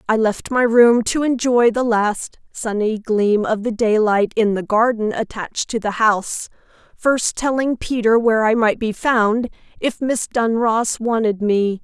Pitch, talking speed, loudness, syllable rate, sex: 225 Hz, 165 wpm, -18 LUFS, 4.2 syllables/s, female